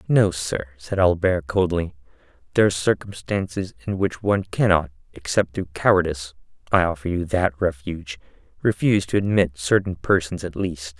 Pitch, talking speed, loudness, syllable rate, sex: 90 Hz, 135 wpm, -22 LUFS, 5.4 syllables/s, male